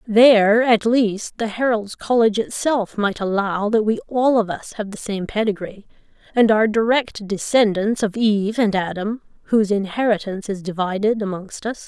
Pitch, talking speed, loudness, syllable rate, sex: 215 Hz, 160 wpm, -19 LUFS, 5.0 syllables/s, female